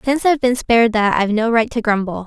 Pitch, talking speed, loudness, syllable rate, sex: 230 Hz, 265 wpm, -16 LUFS, 6.9 syllables/s, female